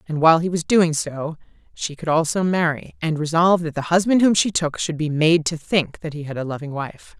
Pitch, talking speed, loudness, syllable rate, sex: 160 Hz, 240 wpm, -20 LUFS, 5.5 syllables/s, female